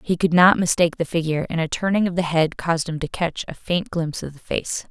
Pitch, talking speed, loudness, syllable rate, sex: 170 Hz, 270 wpm, -21 LUFS, 6.1 syllables/s, female